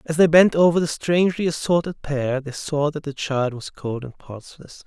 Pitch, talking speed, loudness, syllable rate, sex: 150 Hz, 210 wpm, -21 LUFS, 5.1 syllables/s, male